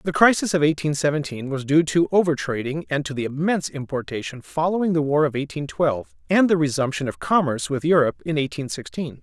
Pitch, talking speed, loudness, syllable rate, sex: 145 Hz, 200 wpm, -22 LUFS, 6.1 syllables/s, male